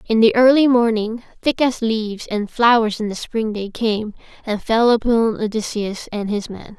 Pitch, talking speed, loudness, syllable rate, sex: 225 Hz, 185 wpm, -18 LUFS, 4.6 syllables/s, female